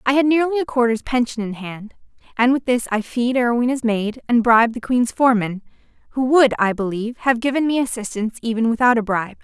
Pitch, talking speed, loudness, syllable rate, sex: 240 Hz, 195 wpm, -19 LUFS, 6.1 syllables/s, female